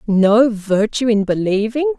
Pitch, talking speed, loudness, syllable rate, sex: 225 Hz, 120 wpm, -16 LUFS, 4.1 syllables/s, female